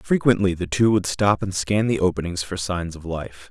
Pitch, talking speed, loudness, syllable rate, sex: 95 Hz, 225 wpm, -22 LUFS, 4.9 syllables/s, male